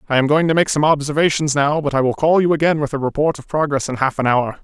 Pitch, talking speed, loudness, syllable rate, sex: 145 Hz, 300 wpm, -17 LUFS, 6.6 syllables/s, male